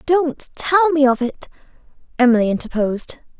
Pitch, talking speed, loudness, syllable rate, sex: 275 Hz, 125 wpm, -18 LUFS, 4.9 syllables/s, female